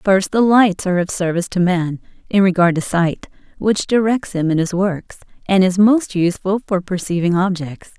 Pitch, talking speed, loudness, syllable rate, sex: 190 Hz, 190 wpm, -17 LUFS, 5.0 syllables/s, female